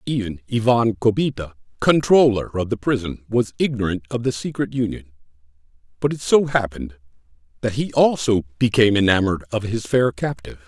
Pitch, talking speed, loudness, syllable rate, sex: 110 Hz, 145 wpm, -20 LUFS, 5.7 syllables/s, male